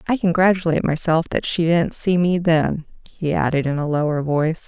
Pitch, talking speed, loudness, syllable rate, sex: 165 Hz, 190 wpm, -19 LUFS, 5.5 syllables/s, female